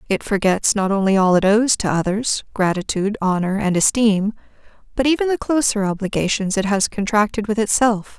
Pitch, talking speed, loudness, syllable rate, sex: 205 Hz, 155 wpm, -18 LUFS, 5.4 syllables/s, female